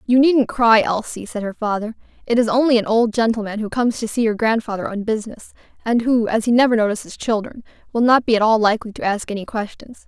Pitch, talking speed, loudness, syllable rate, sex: 225 Hz, 225 wpm, -18 LUFS, 6.2 syllables/s, female